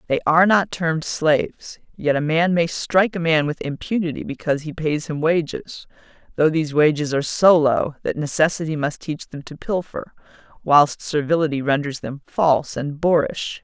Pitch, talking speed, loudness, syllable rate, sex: 155 Hz, 170 wpm, -20 LUFS, 5.1 syllables/s, female